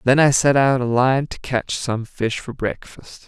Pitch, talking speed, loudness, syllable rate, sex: 125 Hz, 220 wpm, -19 LUFS, 4.1 syllables/s, male